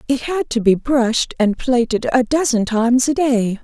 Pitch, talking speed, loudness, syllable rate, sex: 245 Hz, 200 wpm, -17 LUFS, 4.8 syllables/s, female